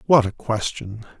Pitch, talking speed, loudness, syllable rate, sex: 115 Hz, 150 wpm, -22 LUFS, 4.5 syllables/s, male